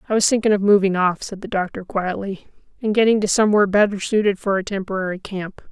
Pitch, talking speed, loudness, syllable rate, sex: 200 Hz, 210 wpm, -19 LUFS, 6.4 syllables/s, female